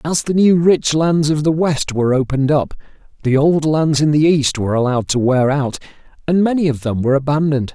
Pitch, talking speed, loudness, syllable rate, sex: 145 Hz, 215 wpm, -16 LUFS, 5.8 syllables/s, male